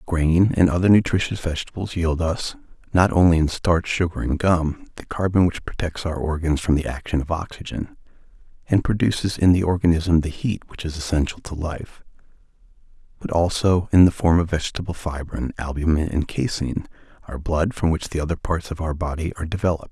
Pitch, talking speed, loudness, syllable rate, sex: 85 Hz, 180 wpm, -22 LUFS, 5.7 syllables/s, male